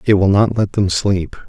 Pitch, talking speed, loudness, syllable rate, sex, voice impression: 100 Hz, 245 wpm, -16 LUFS, 4.6 syllables/s, male, very masculine, very adult-like, old, very thick, relaxed, very powerful, bright, very soft, very muffled, fluent, raspy, very cool, very intellectual, sincere, very calm, very mature, very friendly, very reassuring, very unique, very elegant, wild, very sweet, slightly lively, very kind, modest